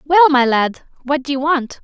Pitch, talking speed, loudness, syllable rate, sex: 280 Hz, 230 wpm, -15 LUFS, 4.6 syllables/s, female